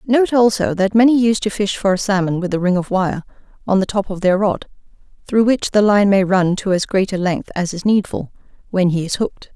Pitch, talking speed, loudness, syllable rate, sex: 200 Hz, 245 wpm, -17 LUFS, 5.5 syllables/s, female